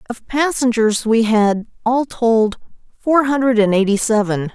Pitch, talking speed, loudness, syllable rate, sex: 230 Hz, 145 wpm, -16 LUFS, 4.2 syllables/s, female